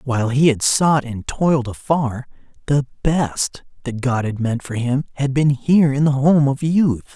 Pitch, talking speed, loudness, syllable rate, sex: 135 Hz, 195 wpm, -18 LUFS, 4.5 syllables/s, male